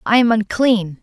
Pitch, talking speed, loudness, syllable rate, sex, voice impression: 215 Hz, 175 wpm, -16 LUFS, 4.4 syllables/s, female, feminine, adult-like, tensed, slightly powerful, bright, clear, friendly, slightly reassuring, elegant, lively